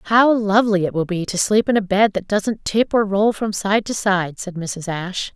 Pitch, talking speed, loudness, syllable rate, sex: 200 Hz, 245 wpm, -19 LUFS, 4.9 syllables/s, female